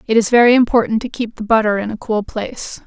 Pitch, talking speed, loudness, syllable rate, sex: 225 Hz, 250 wpm, -16 LUFS, 6.3 syllables/s, female